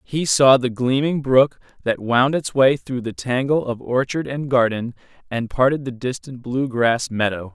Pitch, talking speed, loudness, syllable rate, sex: 130 Hz, 185 wpm, -20 LUFS, 4.4 syllables/s, male